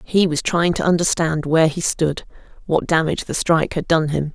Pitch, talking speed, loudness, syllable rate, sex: 165 Hz, 205 wpm, -19 LUFS, 5.5 syllables/s, female